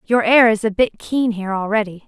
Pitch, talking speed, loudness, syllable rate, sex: 220 Hz, 230 wpm, -17 LUFS, 5.6 syllables/s, female